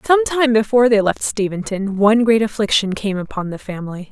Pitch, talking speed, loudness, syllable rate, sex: 215 Hz, 190 wpm, -17 LUFS, 5.7 syllables/s, female